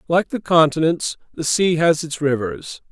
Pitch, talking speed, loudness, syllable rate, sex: 160 Hz, 165 wpm, -19 LUFS, 4.4 syllables/s, male